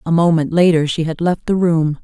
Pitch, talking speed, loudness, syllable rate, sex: 165 Hz, 235 wpm, -15 LUFS, 5.2 syllables/s, female